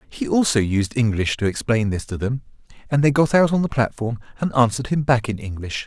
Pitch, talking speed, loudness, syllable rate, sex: 120 Hz, 225 wpm, -21 LUFS, 5.8 syllables/s, male